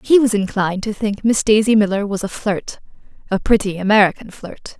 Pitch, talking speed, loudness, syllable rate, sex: 210 Hz, 175 wpm, -17 LUFS, 5.5 syllables/s, female